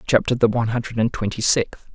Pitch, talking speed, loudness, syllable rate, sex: 115 Hz, 215 wpm, -21 LUFS, 6.2 syllables/s, male